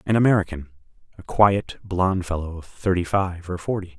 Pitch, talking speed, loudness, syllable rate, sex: 90 Hz, 150 wpm, -22 LUFS, 5.1 syllables/s, male